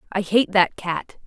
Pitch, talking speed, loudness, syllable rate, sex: 195 Hz, 190 wpm, -21 LUFS, 4.1 syllables/s, female